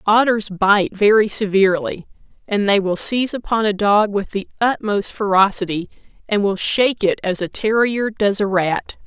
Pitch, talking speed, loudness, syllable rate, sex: 205 Hz, 165 wpm, -18 LUFS, 4.8 syllables/s, female